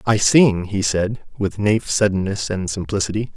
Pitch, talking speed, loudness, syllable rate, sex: 100 Hz, 160 wpm, -19 LUFS, 4.5 syllables/s, male